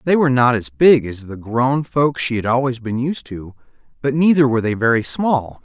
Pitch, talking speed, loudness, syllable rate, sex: 125 Hz, 225 wpm, -17 LUFS, 5.2 syllables/s, male